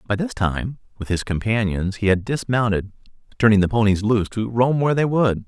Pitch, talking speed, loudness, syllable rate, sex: 110 Hz, 195 wpm, -20 LUFS, 5.6 syllables/s, male